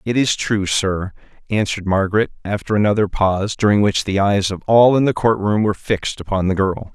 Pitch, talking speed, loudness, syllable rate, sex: 100 Hz, 200 wpm, -18 LUFS, 5.7 syllables/s, male